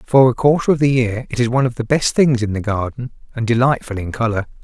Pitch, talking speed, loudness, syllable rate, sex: 120 Hz, 260 wpm, -17 LUFS, 6.3 syllables/s, male